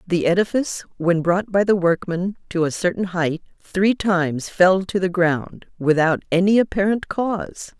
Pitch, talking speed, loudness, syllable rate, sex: 185 Hz, 160 wpm, -20 LUFS, 4.6 syllables/s, female